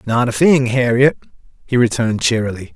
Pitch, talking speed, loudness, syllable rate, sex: 120 Hz, 150 wpm, -15 LUFS, 5.6 syllables/s, male